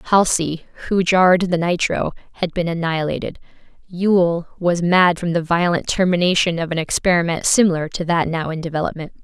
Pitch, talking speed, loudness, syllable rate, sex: 170 Hz, 155 wpm, -18 LUFS, 5.6 syllables/s, female